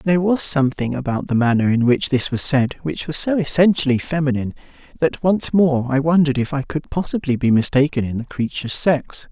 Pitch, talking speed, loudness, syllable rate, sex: 140 Hz, 200 wpm, -18 LUFS, 5.7 syllables/s, male